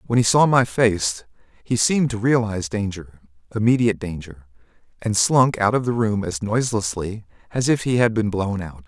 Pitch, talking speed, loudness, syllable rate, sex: 105 Hz, 170 wpm, -20 LUFS, 5.3 syllables/s, male